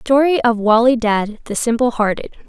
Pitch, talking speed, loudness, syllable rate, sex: 235 Hz, 170 wpm, -16 LUFS, 4.7 syllables/s, female